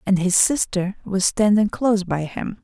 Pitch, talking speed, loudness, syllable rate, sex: 195 Hz, 180 wpm, -20 LUFS, 4.6 syllables/s, female